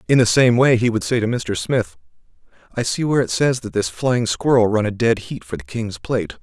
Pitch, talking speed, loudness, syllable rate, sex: 115 Hz, 250 wpm, -19 LUFS, 5.4 syllables/s, male